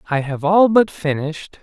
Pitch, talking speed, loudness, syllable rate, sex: 170 Hz, 185 wpm, -17 LUFS, 5.0 syllables/s, male